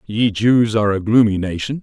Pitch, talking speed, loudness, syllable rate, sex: 110 Hz, 200 wpm, -16 LUFS, 5.2 syllables/s, male